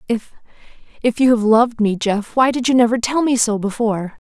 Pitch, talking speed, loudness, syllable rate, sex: 230 Hz, 195 wpm, -17 LUFS, 5.7 syllables/s, female